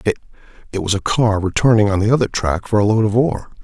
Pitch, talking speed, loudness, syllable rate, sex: 105 Hz, 230 wpm, -17 LUFS, 6.7 syllables/s, male